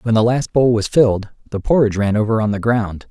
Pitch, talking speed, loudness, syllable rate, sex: 110 Hz, 250 wpm, -16 LUFS, 6.1 syllables/s, male